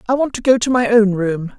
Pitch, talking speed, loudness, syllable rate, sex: 225 Hz, 305 wpm, -15 LUFS, 5.6 syllables/s, female